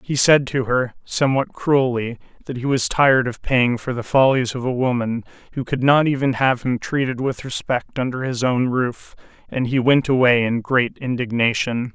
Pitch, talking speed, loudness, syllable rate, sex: 125 Hz, 190 wpm, -19 LUFS, 4.8 syllables/s, male